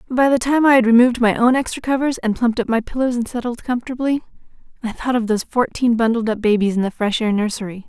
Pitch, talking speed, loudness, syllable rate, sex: 235 Hz, 235 wpm, -18 LUFS, 6.7 syllables/s, female